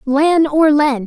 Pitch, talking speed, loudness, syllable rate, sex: 290 Hz, 170 wpm, -13 LUFS, 3.2 syllables/s, female